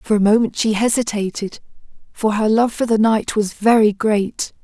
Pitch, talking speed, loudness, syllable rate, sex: 215 Hz, 180 wpm, -17 LUFS, 4.7 syllables/s, female